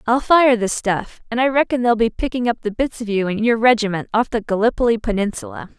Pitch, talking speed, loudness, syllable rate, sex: 230 Hz, 230 wpm, -18 LUFS, 5.9 syllables/s, female